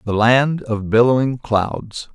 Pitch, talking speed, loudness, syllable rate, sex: 120 Hz, 140 wpm, -17 LUFS, 3.5 syllables/s, male